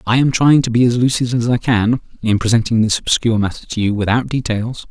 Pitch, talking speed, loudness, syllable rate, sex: 115 Hz, 230 wpm, -16 LUFS, 5.9 syllables/s, male